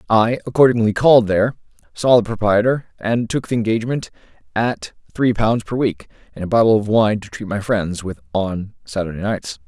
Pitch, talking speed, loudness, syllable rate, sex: 110 Hz, 180 wpm, -18 LUFS, 5.4 syllables/s, male